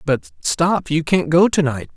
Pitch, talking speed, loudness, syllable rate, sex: 160 Hz, 185 wpm, -18 LUFS, 4.1 syllables/s, male